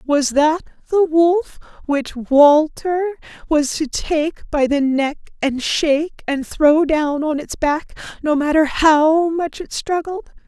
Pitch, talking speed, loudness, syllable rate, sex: 305 Hz, 150 wpm, -17 LUFS, 3.5 syllables/s, female